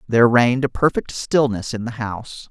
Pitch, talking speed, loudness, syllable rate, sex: 120 Hz, 190 wpm, -19 LUFS, 5.5 syllables/s, male